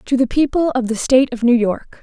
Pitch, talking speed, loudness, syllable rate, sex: 250 Hz, 265 wpm, -16 LUFS, 5.7 syllables/s, female